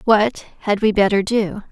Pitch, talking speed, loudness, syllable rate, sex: 205 Hz, 175 wpm, -18 LUFS, 4.5 syllables/s, female